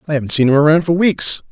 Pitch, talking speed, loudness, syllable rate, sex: 155 Hz, 275 wpm, -13 LUFS, 6.9 syllables/s, male